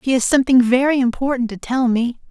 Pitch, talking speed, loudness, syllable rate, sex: 250 Hz, 210 wpm, -17 LUFS, 6.1 syllables/s, female